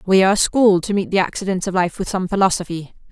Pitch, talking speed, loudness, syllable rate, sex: 190 Hz, 230 wpm, -18 LUFS, 6.7 syllables/s, female